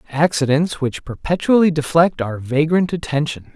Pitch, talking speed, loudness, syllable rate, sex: 150 Hz, 120 wpm, -18 LUFS, 4.9 syllables/s, male